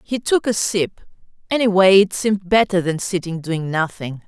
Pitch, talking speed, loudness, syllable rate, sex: 190 Hz, 170 wpm, -18 LUFS, 4.8 syllables/s, female